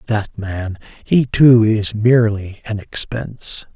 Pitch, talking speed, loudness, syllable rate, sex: 110 Hz, 110 wpm, -16 LUFS, 3.7 syllables/s, male